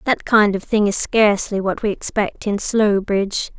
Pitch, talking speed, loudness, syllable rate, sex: 205 Hz, 185 wpm, -18 LUFS, 4.7 syllables/s, female